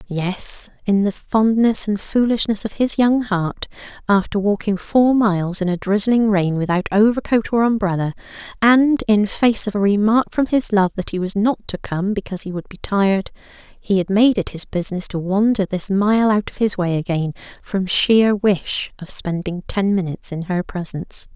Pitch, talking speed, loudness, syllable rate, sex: 200 Hz, 190 wpm, -18 LUFS, 4.8 syllables/s, female